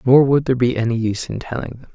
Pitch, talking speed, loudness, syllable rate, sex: 125 Hz, 280 wpm, -18 LUFS, 7.3 syllables/s, male